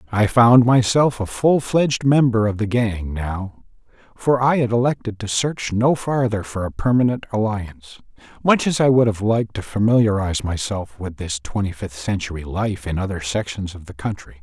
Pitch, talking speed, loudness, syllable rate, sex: 110 Hz, 185 wpm, -19 LUFS, 5.1 syllables/s, male